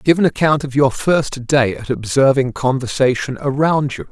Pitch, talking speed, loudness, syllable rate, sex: 135 Hz, 175 wpm, -16 LUFS, 4.7 syllables/s, male